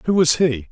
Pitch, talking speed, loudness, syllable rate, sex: 150 Hz, 250 wpm, -17 LUFS, 5.5 syllables/s, male